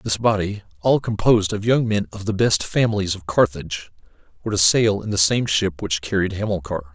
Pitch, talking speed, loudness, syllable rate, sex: 100 Hz, 200 wpm, -20 LUFS, 5.6 syllables/s, male